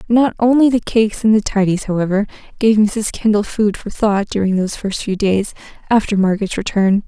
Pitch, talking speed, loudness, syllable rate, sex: 210 Hz, 185 wpm, -16 LUFS, 5.6 syllables/s, female